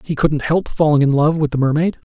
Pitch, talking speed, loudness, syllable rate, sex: 150 Hz, 255 wpm, -16 LUFS, 5.7 syllables/s, male